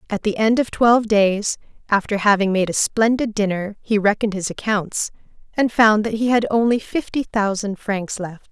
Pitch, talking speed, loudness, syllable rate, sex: 210 Hz, 185 wpm, -19 LUFS, 4.9 syllables/s, female